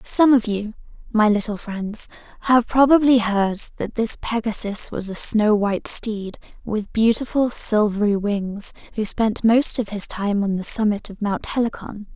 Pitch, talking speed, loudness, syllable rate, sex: 215 Hz, 165 wpm, -20 LUFS, 4.3 syllables/s, female